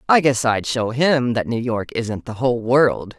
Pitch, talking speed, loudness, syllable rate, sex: 120 Hz, 225 wpm, -19 LUFS, 4.4 syllables/s, female